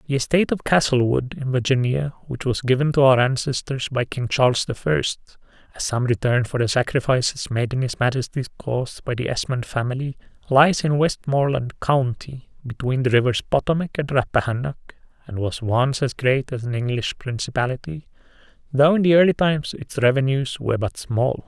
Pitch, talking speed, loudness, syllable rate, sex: 130 Hz, 170 wpm, -21 LUFS, 5.4 syllables/s, male